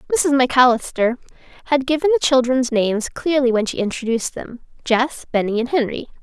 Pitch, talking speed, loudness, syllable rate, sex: 255 Hz, 145 wpm, -18 LUFS, 6.0 syllables/s, female